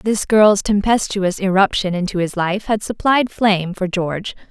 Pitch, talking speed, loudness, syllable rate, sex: 195 Hz, 160 wpm, -17 LUFS, 4.6 syllables/s, female